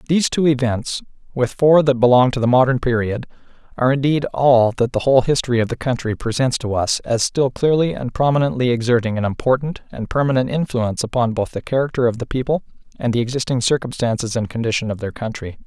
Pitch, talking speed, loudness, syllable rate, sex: 125 Hz, 195 wpm, -18 LUFS, 6.2 syllables/s, male